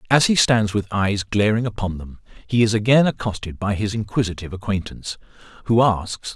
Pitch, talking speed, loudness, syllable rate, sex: 105 Hz, 170 wpm, -20 LUFS, 5.7 syllables/s, male